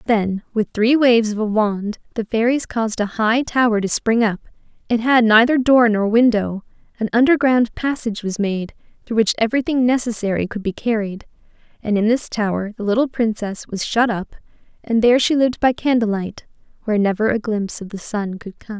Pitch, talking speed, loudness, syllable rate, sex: 225 Hz, 190 wpm, -18 LUFS, 5.4 syllables/s, female